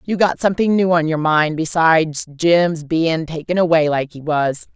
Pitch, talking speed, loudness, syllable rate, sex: 165 Hz, 190 wpm, -17 LUFS, 4.7 syllables/s, female